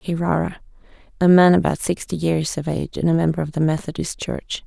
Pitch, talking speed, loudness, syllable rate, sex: 165 Hz, 195 wpm, -20 LUFS, 5.9 syllables/s, female